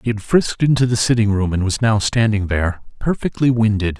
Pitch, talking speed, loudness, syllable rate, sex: 110 Hz, 210 wpm, -17 LUFS, 5.8 syllables/s, male